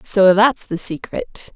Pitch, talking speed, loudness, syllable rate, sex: 220 Hz, 155 wpm, -17 LUFS, 3.5 syllables/s, female